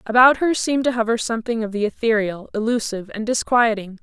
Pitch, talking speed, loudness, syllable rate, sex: 225 Hz, 180 wpm, -20 LUFS, 6.2 syllables/s, female